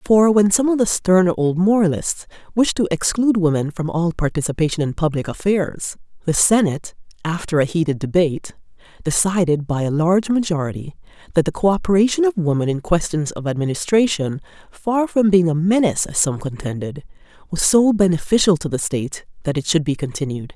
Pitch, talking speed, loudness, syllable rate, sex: 175 Hz, 165 wpm, -18 LUFS, 5.6 syllables/s, female